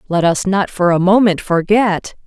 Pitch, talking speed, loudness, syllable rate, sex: 190 Hz, 185 wpm, -14 LUFS, 4.5 syllables/s, female